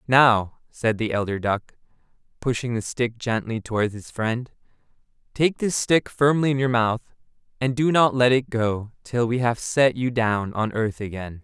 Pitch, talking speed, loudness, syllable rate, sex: 120 Hz, 180 wpm, -23 LUFS, 4.4 syllables/s, male